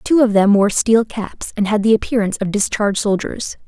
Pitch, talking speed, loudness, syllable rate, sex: 210 Hz, 210 wpm, -16 LUFS, 5.4 syllables/s, female